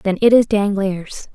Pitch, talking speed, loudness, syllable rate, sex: 205 Hz, 180 wpm, -16 LUFS, 4.0 syllables/s, female